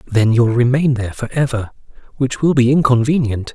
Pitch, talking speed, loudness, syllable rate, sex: 125 Hz, 170 wpm, -16 LUFS, 5.4 syllables/s, male